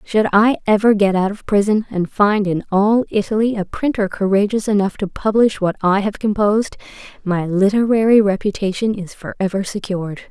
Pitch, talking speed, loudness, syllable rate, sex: 205 Hz, 165 wpm, -17 LUFS, 5.3 syllables/s, female